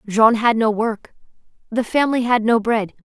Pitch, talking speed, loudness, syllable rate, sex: 225 Hz, 175 wpm, -18 LUFS, 4.9 syllables/s, female